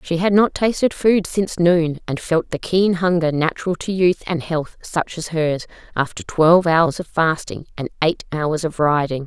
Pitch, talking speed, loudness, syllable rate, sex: 165 Hz, 195 wpm, -19 LUFS, 4.6 syllables/s, female